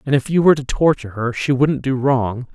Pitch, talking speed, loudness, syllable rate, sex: 135 Hz, 260 wpm, -18 LUFS, 5.9 syllables/s, male